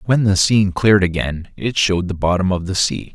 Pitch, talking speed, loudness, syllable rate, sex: 95 Hz, 230 wpm, -17 LUFS, 5.8 syllables/s, male